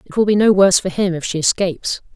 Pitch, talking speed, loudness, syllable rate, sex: 185 Hz, 280 wpm, -16 LUFS, 6.8 syllables/s, female